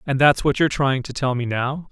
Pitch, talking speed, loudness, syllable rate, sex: 135 Hz, 280 wpm, -20 LUFS, 5.7 syllables/s, male